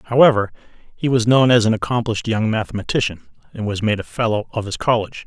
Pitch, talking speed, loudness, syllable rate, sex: 115 Hz, 195 wpm, -19 LUFS, 6.8 syllables/s, male